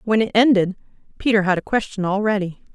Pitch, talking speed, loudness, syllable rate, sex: 205 Hz, 195 wpm, -19 LUFS, 6.2 syllables/s, female